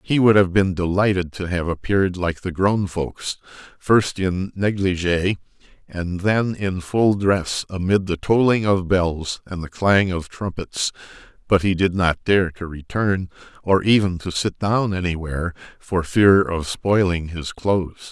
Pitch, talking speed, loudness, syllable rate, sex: 95 Hz, 160 wpm, -20 LUFS, 4.2 syllables/s, male